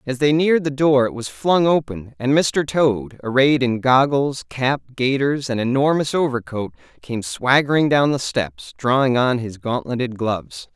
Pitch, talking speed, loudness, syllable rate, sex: 130 Hz, 165 wpm, -19 LUFS, 4.5 syllables/s, male